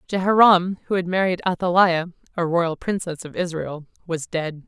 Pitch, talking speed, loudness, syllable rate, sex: 175 Hz, 155 wpm, -21 LUFS, 4.9 syllables/s, female